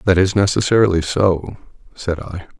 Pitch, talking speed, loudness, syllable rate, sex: 95 Hz, 140 wpm, -17 LUFS, 5.1 syllables/s, male